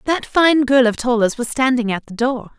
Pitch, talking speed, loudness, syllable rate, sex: 245 Hz, 230 wpm, -17 LUFS, 5.0 syllables/s, female